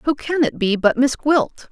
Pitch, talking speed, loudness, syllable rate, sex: 265 Hz, 245 wpm, -18 LUFS, 4.2 syllables/s, female